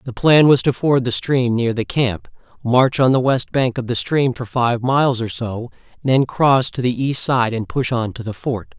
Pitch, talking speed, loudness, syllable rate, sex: 125 Hz, 245 wpm, -18 LUFS, 4.8 syllables/s, male